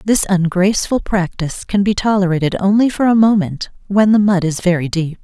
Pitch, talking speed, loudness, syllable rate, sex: 190 Hz, 185 wpm, -15 LUFS, 5.5 syllables/s, female